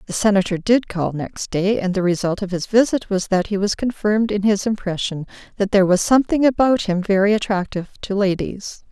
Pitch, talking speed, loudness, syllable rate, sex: 200 Hz, 200 wpm, -19 LUFS, 5.7 syllables/s, female